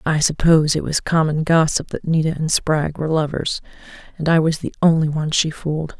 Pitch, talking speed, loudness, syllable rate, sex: 155 Hz, 200 wpm, -19 LUFS, 5.9 syllables/s, female